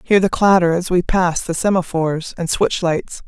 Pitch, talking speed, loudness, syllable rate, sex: 175 Hz, 200 wpm, -17 LUFS, 4.8 syllables/s, female